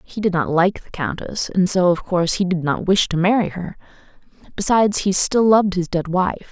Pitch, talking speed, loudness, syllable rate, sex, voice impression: 185 Hz, 220 wpm, -18 LUFS, 5.3 syllables/s, female, very feminine, very adult-like, slightly middle-aged, thin, slightly tensed, powerful, slightly dark, hard, very clear, fluent, slightly raspy, slightly cute, cool, intellectual, refreshing, sincere, slightly calm, slightly friendly, reassuring, unique, slightly elegant, slightly sweet, slightly lively, strict, slightly intense, slightly sharp